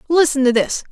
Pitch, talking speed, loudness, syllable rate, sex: 280 Hz, 200 wpm, -16 LUFS, 5.9 syllables/s, female